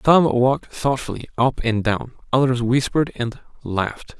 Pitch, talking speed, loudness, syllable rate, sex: 125 Hz, 145 wpm, -21 LUFS, 4.8 syllables/s, male